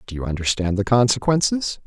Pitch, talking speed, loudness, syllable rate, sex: 115 Hz, 160 wpm, -20 LUFS, 5.9 syllables/s, male